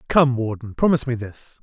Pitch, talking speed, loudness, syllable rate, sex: 125 Hz, 185 wpm, -21 LUFS, 5.6 syllables/s, male